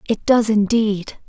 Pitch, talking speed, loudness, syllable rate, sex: 215 Hz, 140 wpm, -17 LUFS, 3.9 syllables/s, female